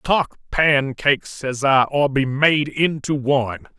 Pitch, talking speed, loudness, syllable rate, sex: 140 Hz, 145 wpm, -19 LUFS, 3.9 syllables/s, male